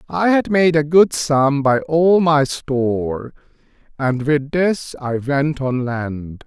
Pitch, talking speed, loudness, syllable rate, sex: 145 Hz, 160 wpm, -17 LUFS, 3.2 syllables/s, male